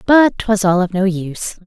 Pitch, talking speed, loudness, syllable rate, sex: 200 Hz, 215 wpm, -16 LUFS, 4.7 syllables/s, female